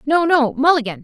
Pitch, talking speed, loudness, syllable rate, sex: 290 Hz, 175 wpm, -16 LUFS, 5.5 syllables/s, female